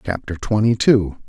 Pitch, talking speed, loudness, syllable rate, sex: 105 Hz, 140 wpm, -18 LUFS, 4.6 syllables/s, male